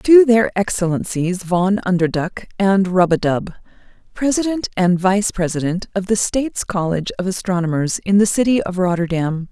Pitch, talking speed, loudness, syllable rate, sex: 190 Hz, 150 wpm, -18 LUFS, 4.9 syllables/s, female